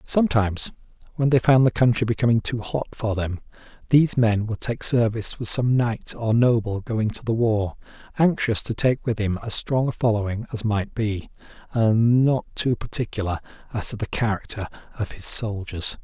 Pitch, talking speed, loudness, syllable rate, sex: 115 Hz, 180 wpm, -22 LUFS, 5.1 syllables/s, male